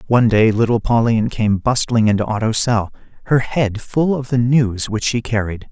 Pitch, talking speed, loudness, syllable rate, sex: 115 Hz, 190 wpm, -17 LUFS, 5.0 syllables/s, male